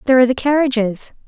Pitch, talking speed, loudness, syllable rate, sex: 255 Hz, 190 wpm, -16 LUFS, 7.9 syllables/s, female